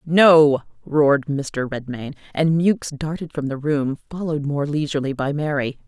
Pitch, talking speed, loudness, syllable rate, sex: 150 Hz, 155 wpm, -20 LUFS, 4.7 syllables/s, female